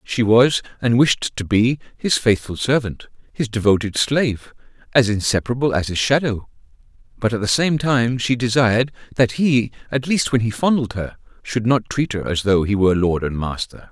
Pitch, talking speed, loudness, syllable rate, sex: 115 Hz, 185 wpm, -19 LUFS, 5.1 syllables/s, male